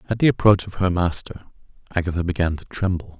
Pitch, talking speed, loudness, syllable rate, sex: 90 Hz, 190 wpm, -21 LUFS, 6.2 syllables/s, male